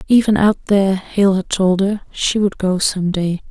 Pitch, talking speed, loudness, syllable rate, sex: 195 Hz, 205 wpm, -16 LUFS, 4.3 syllables/s, female